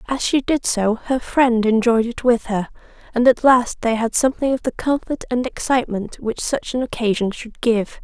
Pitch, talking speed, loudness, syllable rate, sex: 240 Hz, 200 wpm, -19 LUFS, 4.9 syllables/s, female